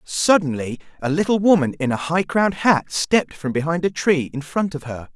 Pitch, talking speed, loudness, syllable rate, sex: 160 Hz, 210 wpm, -20 LUFS, 5.4 syllables/s, male